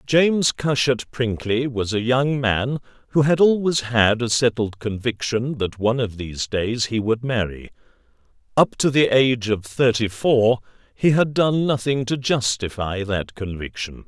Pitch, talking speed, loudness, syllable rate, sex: 120 Hz, 160 wpm, -21 LUFS, 4.4 syllables/s, male